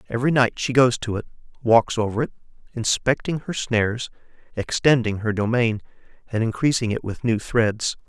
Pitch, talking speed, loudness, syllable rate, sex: 120 Hz, 155 wpm, -22 LUFS, 5.2 syllables/s, male